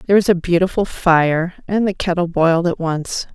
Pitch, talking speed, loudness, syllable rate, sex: 175 Hz, 195 wpm, -17 LUFS, 5.3 syllables/s, female